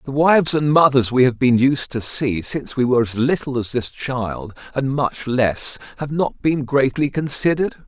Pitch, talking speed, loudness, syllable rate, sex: 130 Hz, 200 wpm, -19 LUFS, 4.8 syllables/s, male